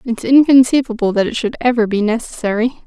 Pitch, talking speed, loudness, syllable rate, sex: 235 Hz, 170 wpm, -15 LUFS, 6.0 syllables/s, female